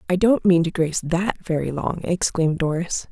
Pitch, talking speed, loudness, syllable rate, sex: 175 Hz, 195 wpm, -21 LUFS, 5.4 syllables/s, female